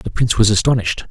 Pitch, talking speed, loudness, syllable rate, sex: 115 Hz, 220 wpm, -15 LUFS, 7.7 syllables/s, male